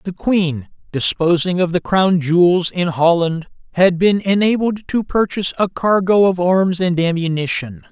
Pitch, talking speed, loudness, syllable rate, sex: 180 Hz, 150 wpm, -16 LUFS, 4.4 syllables/s, male